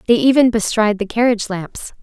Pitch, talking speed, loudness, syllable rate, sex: 220 Hz, 180 wpm, -16 LUFS, 6.2 syllables/s, female